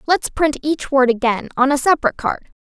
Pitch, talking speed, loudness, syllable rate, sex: 275 Hz, 200 wpm, -17 LUFS, 5.8 syllables/s, female